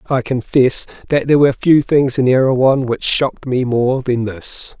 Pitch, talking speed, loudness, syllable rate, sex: 130 Hz, 190 wpm, -15 LUFS, 4.7 syllables/s, male